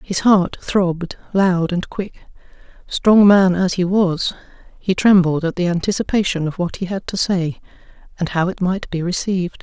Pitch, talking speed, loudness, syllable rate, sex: 185 Hz, 175 wpm, -18 LUFS, 4.7 syllables/s, female